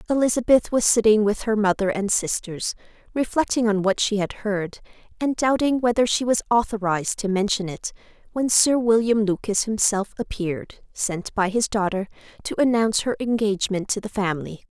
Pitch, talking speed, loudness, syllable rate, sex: 215 Hz, 165 wpm, -22 LUFS, 5.3 syllables/s, female